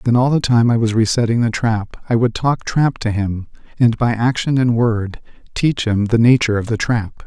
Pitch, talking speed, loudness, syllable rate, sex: 115 Hz, 225 wpm, -17 LUFS, 4.9 syllables/s, male